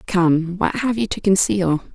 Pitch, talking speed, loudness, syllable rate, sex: 190 Hz, 185 wpm, -19 LUFS, 4.1 syllables/s, female